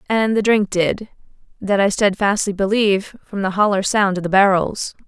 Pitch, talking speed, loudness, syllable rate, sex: 200 Hz, 175 wpm, -17 LUFS, 5.0 syllables/s, female